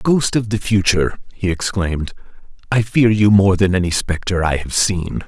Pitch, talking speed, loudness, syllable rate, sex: 95 Hz, 180 wpm, -17 LUFS, 4.9 syllables/s, male